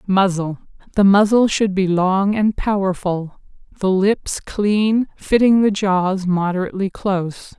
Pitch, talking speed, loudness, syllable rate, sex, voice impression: 195 Hz, 120 wpm, -18 LUFS, 4.0 syllables/s, female, feminine, adult-like, slightly cool, slightly intellectual, calm, reassuring